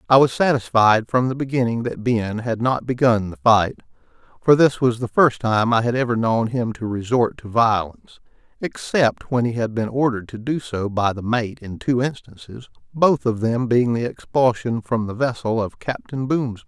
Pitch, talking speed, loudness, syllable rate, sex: 120 Hz, 200 wpm, -20 LUFS, 4.9 syllables/s, male